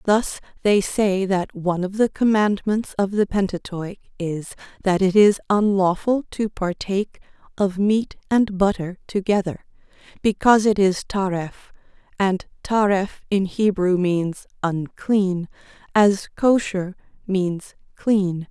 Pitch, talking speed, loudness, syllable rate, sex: 195 Hz, 120 wpm, -21 LUFS, 4.0 syllables/s, female